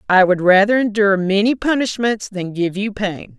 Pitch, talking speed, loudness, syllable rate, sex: 200 Hz, 175 wpm, -17 LUFS, 5.0 syllables/s, female